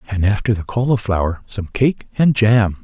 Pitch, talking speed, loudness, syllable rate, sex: 105 Hz, 170 wpm, -18 LUFS, 5.0 syllables/s, male